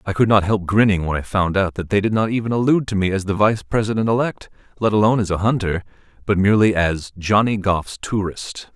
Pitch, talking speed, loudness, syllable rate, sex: 100 Hz, 225 wpm, -19 LUFS, 6.0 syllables/s, male